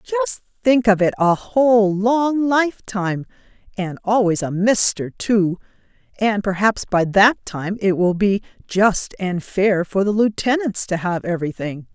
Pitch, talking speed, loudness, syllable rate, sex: 200 Hz, 135 wpm, -19 LUFS, 4.6 syllables/s, female